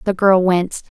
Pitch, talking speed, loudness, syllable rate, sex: 185 Hz, 180 wpm, -15 LUFS, 5.4 syllables/s, female